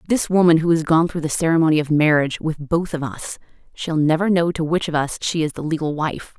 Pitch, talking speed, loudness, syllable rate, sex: 160 Hz, 245 wpm, -19 LUFS, 5.9 syllables/s, female